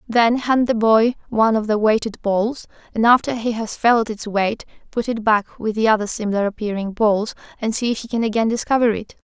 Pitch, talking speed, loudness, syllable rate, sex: 220 Hz, 215 wpm, -19 LUFS, 5.4 syllables/s, female